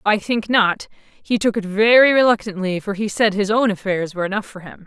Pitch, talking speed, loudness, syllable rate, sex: 205 Hz, 220 wpm, -18 LUFS, 5.3 syllables/s, female